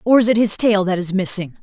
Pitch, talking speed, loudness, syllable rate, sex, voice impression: 200 Hz, 295 wpm, -16 LUFS, 6.0 syllables/s, female, feminine, middle-aged, tensed, powerful, clear, fluent, intellectual, slightly friendly, elegant, lively, strict, sharp